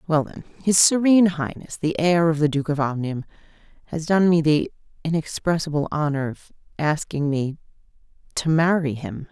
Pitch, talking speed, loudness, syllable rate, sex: 155 Hz, 140 wpm, -21 LUFS, 5.2 syllables/s, female